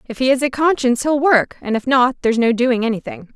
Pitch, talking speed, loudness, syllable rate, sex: 255 Hz, 250 wpm, -17 LUFS, 6.1 syllables/s, female